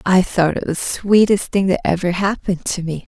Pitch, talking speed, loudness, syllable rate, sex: 185 Hz, 210 wpm, -18 LUFS, 5.2 syllables/s, female